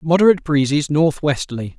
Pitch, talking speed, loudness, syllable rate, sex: 150 Hz, 135 wpm, -17 LUFS, 5.9 syllables/s, male